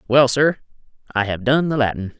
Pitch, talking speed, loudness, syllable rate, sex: 125 Hz, 190 wpm, -19 LUFS, 5.4 syllables/s, male